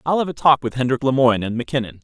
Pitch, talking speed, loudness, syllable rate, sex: 130 Hz, 265 wpm, -19 LUFS, 7.3 syllables/s, male